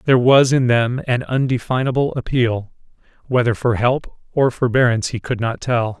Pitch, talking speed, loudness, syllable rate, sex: 125 Hz, 160 wpm, -18 LUFS, 5.0 syllables/s, male